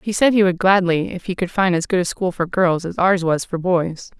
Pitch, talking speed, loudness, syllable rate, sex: 180 Hz, 285 wpm, -18 LUFS, 5.2 syllables/s, female